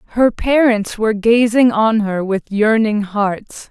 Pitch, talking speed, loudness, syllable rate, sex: 220 Hz, 145 wpm, -15 LUFS, 3.9 syllables/s, female